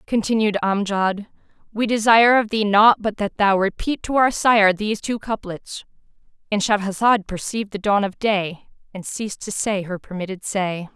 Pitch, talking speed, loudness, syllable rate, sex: 205 Hz, 165 wpm, -20 LUFS, 4.9 syllables/s, female